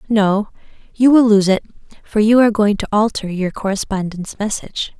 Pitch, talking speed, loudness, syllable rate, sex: 210 Hz, 170 wpm, -16 LUFS, 5.3 syllables/s, female